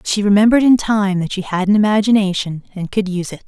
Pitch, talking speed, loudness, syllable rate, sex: 200 Hz, 240 wpm, -15 LUFS, 6.7 syllables/s, female